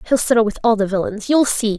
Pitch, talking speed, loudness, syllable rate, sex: 220 Hz, 270 wpm, -17 LUFS, 6.4 syllables/s, female